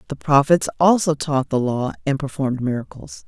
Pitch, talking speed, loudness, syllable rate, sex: 145 Hz, 165 wpm, -19 LUFS, 5.3 syllables/s, female